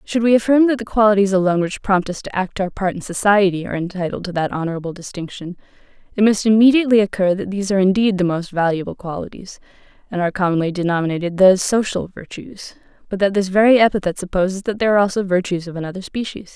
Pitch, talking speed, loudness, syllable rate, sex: 195 Hz, 200 wpm, -18 LUFS, 6.9 syllables/s, female